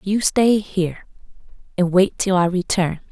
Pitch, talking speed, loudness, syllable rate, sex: 185 Hz, 155 wpm, -19 LUFS, 4.6 syllables/s, female